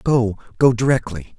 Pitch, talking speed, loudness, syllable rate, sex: 115 Hz, 130 wpm, -18 LUFS, 4.8 syllables/s, male